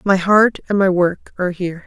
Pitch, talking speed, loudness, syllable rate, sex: 185 Hz, 225 wpm, -16 LUFS, 5.6 syllables/s, female